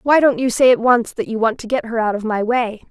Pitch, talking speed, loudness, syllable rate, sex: 235 Hz, 330 wpm, -17 LUFS, 5.8 syllables/s, female